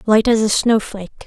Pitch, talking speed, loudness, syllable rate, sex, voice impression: 215 Hz, 190 wpm, -16 LUFS, 6.1 syllables/s, female, feminine, slightly young, relaxed, slightly weak, clear, fluent, raspy, intellectual, calm, friendly, kind, modest